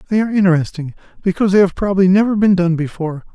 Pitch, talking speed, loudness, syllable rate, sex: 185 Hz, 195 wpm, -15 LUFS, 7.9 syllables/s, male